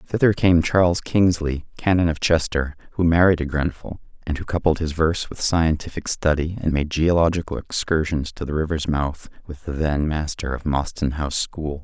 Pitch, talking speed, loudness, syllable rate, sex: 80 Hz, 175 wpm, -21 LUFS, 5.1 syllables/s, male